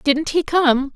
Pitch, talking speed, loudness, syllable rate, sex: 295 Hz, 190 wpm, -18 LUFS, 3.5 syllables/s, female